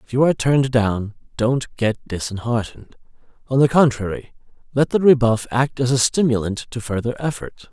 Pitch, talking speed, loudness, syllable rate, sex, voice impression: 125 Hz, 165 wpm, -19 LUFS, 5.1 syllables/s, male, very masculine, middle-aged, very thick, tensed, very powerful, slightly bright, soft, clear, slightly fluent, very cool, intellectual, refreshing, sincere, very calm, friendly, very reassuring, unique, slightly elegant, wild, slightly sweet, lively, kind, slightly modest